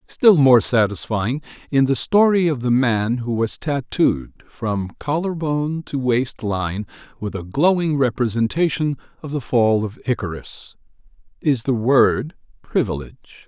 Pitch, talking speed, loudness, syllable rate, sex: 125 Hz, 140 wpm, -20 LUFS, 4.2 syllables/s, male